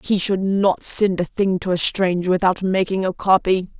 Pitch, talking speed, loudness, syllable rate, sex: 185 Hz, 205 wpm, -19 LUFS, 4.7 syllables/s, female